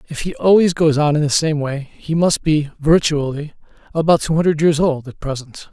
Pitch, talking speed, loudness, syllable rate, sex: 155 Hz, 210 wpm, -17 LUFS, 5.2 syllables/s, male